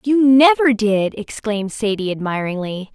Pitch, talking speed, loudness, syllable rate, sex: 220 Hz, 120 wpm, -17 LUFS, 4.6 syllables/s, female